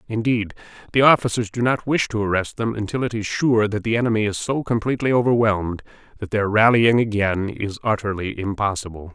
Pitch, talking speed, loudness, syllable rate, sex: 110 Hz, 175 wpm, -20 LUFS, 5.8 syllables/s, male